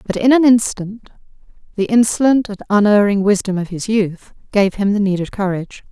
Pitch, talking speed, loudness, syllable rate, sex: 205 Hz, 170 wpm, -16 LUFS, 5.4 syllables/s, female